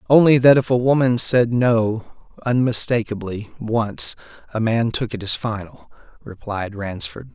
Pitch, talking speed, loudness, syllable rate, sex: 115 Hz, 125 wpm, -19 LUFS, 4.2 syllables/s, male